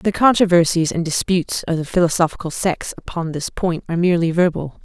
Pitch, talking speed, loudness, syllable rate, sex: 170 Hz, 175 wpm, -18 LUFS, 6.0 syllables/s, female